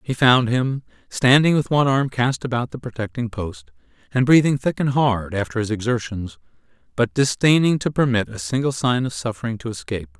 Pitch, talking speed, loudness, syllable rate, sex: 120 Hz, 185 wpm, -20 LUFS, 5.4 syllables/s, male